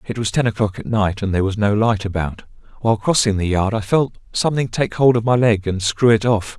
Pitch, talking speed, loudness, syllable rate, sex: 110 Hz, 255 wpm, -18 LUFS, 5.9 syllables/s, male